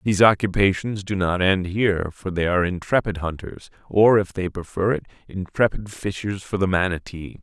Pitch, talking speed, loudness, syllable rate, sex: 95 Hz, 170 wpm, -22 LUFS, 5.3 syllables/s, male